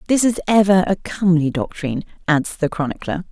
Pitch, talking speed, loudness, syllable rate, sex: 175 Hz, 165 wpm, -19 LUFS, 5.8 syllables/s, female